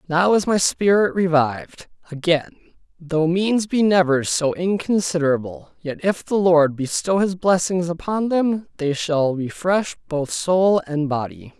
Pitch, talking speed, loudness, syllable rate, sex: 170 Hz, 145 wpm, -20 LUFS, 4.2 syllables/s, male